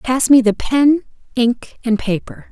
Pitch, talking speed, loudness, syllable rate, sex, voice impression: 250 Hz, 165 wpm, -16 LUFS, 3.9 syllables/s, female, feminine, slightly young, slightly clear, fluent, refreshing, calm, slightly lively